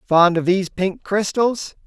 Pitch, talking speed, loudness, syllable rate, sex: 190 Hz, 160 wpm, -19 LUFS, 4.2 syllables/s, male